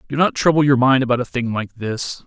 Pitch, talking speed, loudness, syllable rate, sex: 130 Hz, 265 wpm, -18 LUFS, 5.7 syllables/s, male